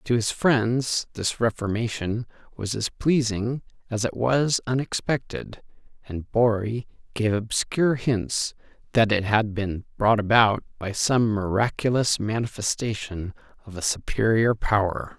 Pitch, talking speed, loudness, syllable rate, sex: 110 Hz, 120 wpm, -24 LUFS, 4.1 syllables/s, male